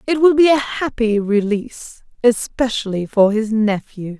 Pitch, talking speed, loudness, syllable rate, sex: 230 Hz, 130 wpm, -17 LUFS, 4.4 syllables/s, female